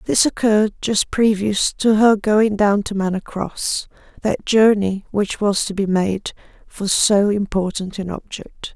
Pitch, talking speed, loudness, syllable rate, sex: 205 Hz, 150 wpm, -18 LUFS, 4.0 syllables/s, female